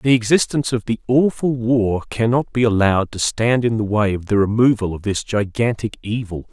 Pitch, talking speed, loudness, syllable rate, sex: 115 Hz, 195 wpm, -18 LUFS, 5.2 syllables/s, male